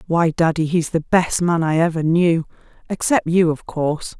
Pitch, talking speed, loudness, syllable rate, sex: 165 Hz, 170 wpm, -18 LUFS, 4.7 syllables/s, female